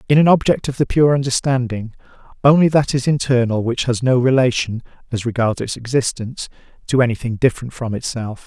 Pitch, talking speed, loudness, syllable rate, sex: 125 Hz, 170 wpm, -18 LUFS, 5.2 syllables/s, male